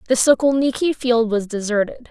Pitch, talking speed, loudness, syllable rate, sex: 240 Hz, 140 wpm, -18 LUFS, 5.2 syllables/s, female